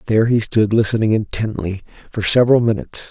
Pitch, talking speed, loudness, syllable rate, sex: 110 Hz, 155 wpm, -17 LUFS, 6.4 syllables/s, male